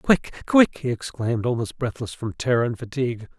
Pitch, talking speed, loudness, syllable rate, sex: 125 Hz, 175 wpm, -23 LUFS, 5.4 syllables/s, male